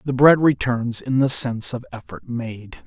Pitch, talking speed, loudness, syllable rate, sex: 125 Hz, 190 wpm, -19 LUFS, 4.7 syllables/s, male